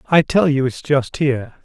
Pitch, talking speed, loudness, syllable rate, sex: 140 Hz, 220 wpm, -17 LUFS, 4.7 syllables/s, male